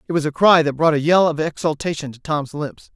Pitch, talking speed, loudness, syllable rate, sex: 155 Hz, 265 wpm, -18 LUFS, 5.7 syllables/s, male